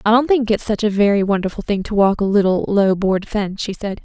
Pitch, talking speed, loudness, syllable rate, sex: 205 Hz, 265 wpm, -17 LUFS, 5.9 syllables/s, female